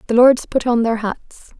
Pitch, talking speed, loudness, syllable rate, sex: 235 Hz, 225 wpm, -16 LUFS, 4.4 syllables/s, female